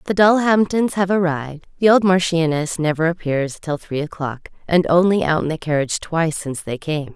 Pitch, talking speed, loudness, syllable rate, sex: 165 Hz, 185 wpm, -19 LUFS, 5.4 syllables/s, female